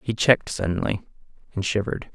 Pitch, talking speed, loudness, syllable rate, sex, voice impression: 105 Hz, 140 wpm, -24 LUFS, 6.4 syllables/s, male, masculine, adult-like, slightly middle-aged, slightly thick, slightly tensed, slightly weak, slightly dark, slightly soft, muffled, slightly halting, slightly raspy, slightly cool, intellectual, slightly refreshing, sincere, calm, slightly mature, slightly friendly, reassuring, unique, slightly wild, kind, very modest